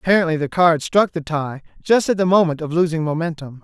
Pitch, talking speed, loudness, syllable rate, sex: 165 Hz, 230 wpm, -18 LUFS, 6.2 syllables/s, male